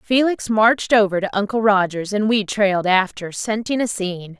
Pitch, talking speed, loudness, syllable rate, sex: 210 Hz, 180 wpm, -19 LUFS, 5.1 syllables/s, female